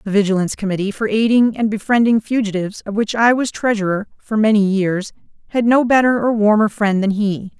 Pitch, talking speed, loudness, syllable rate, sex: 215 Hz, 190 wpm, -17 LUFS, 5.8 syllables/s, female